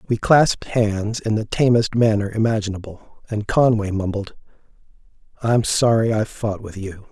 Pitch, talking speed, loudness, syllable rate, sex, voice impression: 110 Hz, 145 wpm, -19 LUFS, 4.7 syllables/s, male, very masculine, very adult-like, very middle-aged, slightly old, very thick, slightly relaxed, slightly powerful, slightly dark, slightly hard, slightly clear, fluent, slightly raspy, cool, very intellectual, sincere, calm, mature, very friendly, reassuring, slightly unique, wild, slightly sweet, slightly lively, very kind